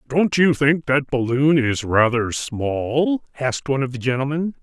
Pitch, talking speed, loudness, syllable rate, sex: 135 Hz, 170 wpm, -20 LUFS, 4.5 syllables/s, male